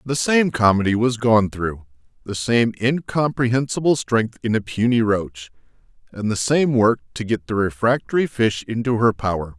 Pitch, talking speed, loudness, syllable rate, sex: 115 Hz, 165 wpm, -20 LUFS, 4.7 syllables/s, male